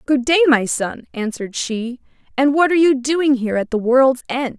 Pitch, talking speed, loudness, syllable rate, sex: 260 Hz, 210 wpm, -17 LUFS, 5.1 syllables/s, female